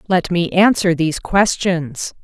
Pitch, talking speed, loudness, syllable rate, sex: 175 Hz, 135 wpm, -16 LUFS, 4.0 syllables/s, female